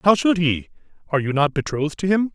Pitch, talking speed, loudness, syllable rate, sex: 165 Hz, 230 wpm, -21 LUFS, 6.5 syllables/s, male